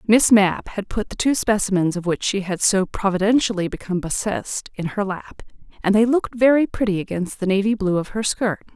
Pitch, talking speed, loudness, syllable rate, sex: 200 Hz, 205 wpm, -20 LUFS, 5.5 syllables/s, female